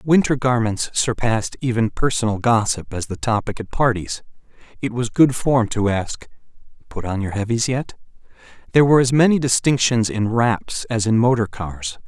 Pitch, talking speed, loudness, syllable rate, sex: 115 Hz, 165 wpm, -19 LUFS, 5.0 syllables/s, male